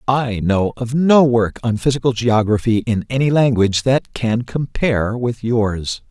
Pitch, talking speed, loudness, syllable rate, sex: 115 Hz, 155 wpm, -17 LUFS, 4.3 syllables/s, male